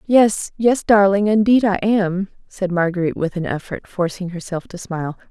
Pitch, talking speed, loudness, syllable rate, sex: 195 Hz, 160 wpm, -18 LUFS, 5.0 syllables/s, female